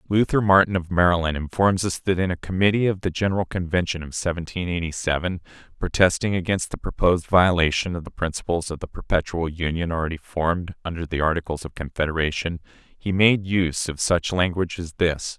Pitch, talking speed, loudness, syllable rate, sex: 85 Hz, 175 wpm, -23 LUFS, 5.9 syllables/s, male